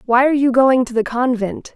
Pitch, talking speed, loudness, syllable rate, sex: 250 Hz, 240 wpm, -16 LUFS, 5.6 syllables/s, female